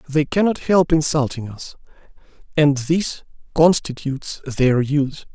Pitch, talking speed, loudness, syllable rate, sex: 145 Hz, 110 wpm, -19 LUFS, 4.3 syllables/s, male